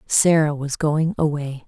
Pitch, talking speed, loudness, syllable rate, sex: 150 Hz, 145 wpm, -20 LUFS, 4.0 syllables/s, female